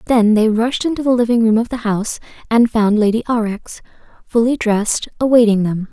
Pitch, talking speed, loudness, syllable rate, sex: 225 Hz, 180 wpm, -15 LUFS, 5.6 syllables/s, female